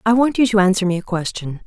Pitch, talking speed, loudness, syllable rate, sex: 200 Hz, 290 wpm, -17 LUFS, 6.4 syllables/s, female